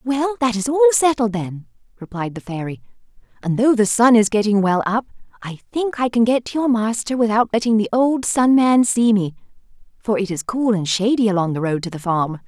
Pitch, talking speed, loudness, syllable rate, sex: 225 Hz, 215 wpm, -18 LUFS, 5.4 syllables/s, female